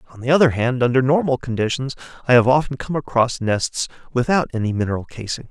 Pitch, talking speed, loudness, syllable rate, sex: 125 Hz, 185 wpm, -19 LUFS, 6.1 syllables/s, male